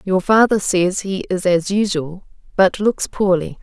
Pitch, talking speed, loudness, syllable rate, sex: 190 Hz, 165 wpm, -17 LUFS, 4.1 syllables/s, female